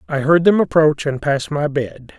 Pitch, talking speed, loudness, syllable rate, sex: 150 Hz, 220 wpm, -16 LUFS, 4.6 syllables/s, male